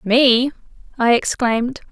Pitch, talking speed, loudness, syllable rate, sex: 245 Hz, 95 wpm, -17 LUFS, 3.9 syllables/s, female